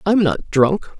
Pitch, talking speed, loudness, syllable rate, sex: 180 Hz, 180 wpm, -17 LUFS, 4.4 syllables/s, female